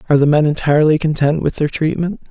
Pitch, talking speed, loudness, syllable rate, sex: 155 Hz, 210 wpm, -15 LUFS, 6.8 syllables/s, male